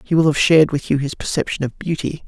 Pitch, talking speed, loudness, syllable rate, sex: 150 Hz, 265 wpm, -18 LUFS, 6.5 syllables/s, male